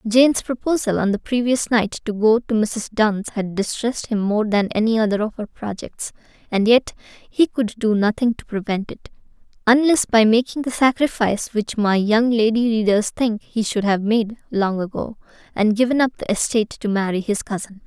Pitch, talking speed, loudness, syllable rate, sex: 220 Hz, 190 wpm, -19 LUFS, 5.0 syllables/s, female